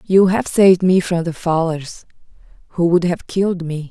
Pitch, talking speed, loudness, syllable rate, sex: 175 Hz, 185 wpm, -16 LUFS, 4.8 syllables/s, female